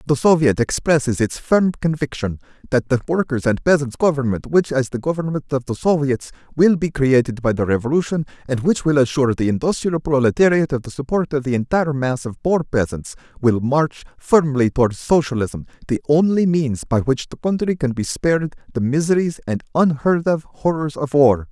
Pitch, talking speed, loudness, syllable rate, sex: 140 Hz, 180 wpm, -19 LUFS, 5.3 syllables/s, male